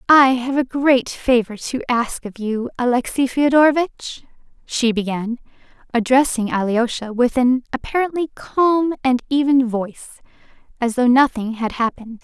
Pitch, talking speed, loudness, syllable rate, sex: 250 Hz, 130 wpm, -18 LUFS, 4.6 syllables/s, female